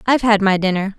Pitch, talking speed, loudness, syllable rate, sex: 205 Hz, 245 wpm, -16 LUFS, 6.9 syllables/s, female